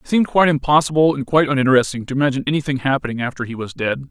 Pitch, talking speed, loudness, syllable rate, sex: 140 Hz, 220 wpm, -18 LUFS, 8.2 syllables/s, male